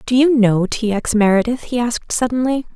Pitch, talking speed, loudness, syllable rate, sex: 235 Hz, 195 wpm, -17 LUFS, 5.5 syllables/s, female